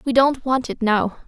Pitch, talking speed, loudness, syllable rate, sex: 245 Hz, 235 wpm, -20 LUFS, 4.5 syllables/s, female